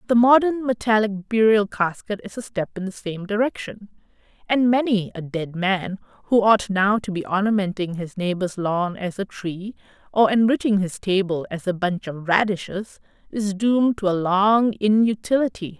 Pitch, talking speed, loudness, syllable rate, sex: 205 Hz, 165 wpm, -21 LUFS, 4.7 syllables/s, female